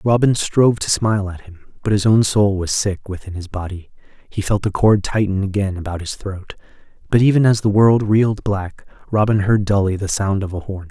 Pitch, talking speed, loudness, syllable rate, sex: 100 Hz, 215 wpm, -18 LUFS, 5.4 syllables/s, male